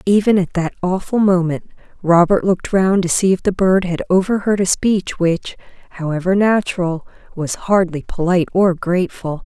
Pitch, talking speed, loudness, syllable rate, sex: 185 Hz, 160 wpm, -17 LUFS, 5.1 syllables/s, female